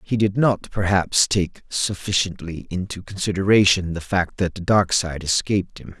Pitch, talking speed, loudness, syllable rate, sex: 95 Hz, 160 wpm, -21 LUFS, 4.7 syllables/s, male